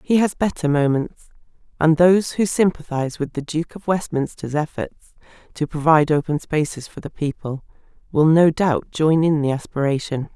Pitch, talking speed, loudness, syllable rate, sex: 155 Hz, 160 wpm, -20 LUFS, 5.2 syllables/s, female